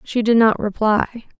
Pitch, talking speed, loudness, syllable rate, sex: 220 Hz, 170 wpm, -17 LUFS, 4.2 syllables/s, female